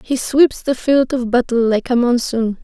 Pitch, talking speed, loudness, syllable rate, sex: 245 Hz, 205 wpm, -16 LUFS, 4.4 syllables/s, female